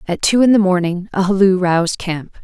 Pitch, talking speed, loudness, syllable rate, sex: 190 Hz, 220 wpm, -15 LUFS, 5.4 syllables/s, female